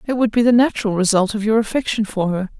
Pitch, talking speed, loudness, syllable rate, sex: 215 Hz, 255 wpm, -17 LUFS, 6.5 syllables/s, female